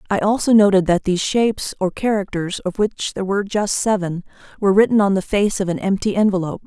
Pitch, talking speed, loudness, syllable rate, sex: 195 Hz, 205 wpm, -18 LUFS, 6.3 syllables/s, female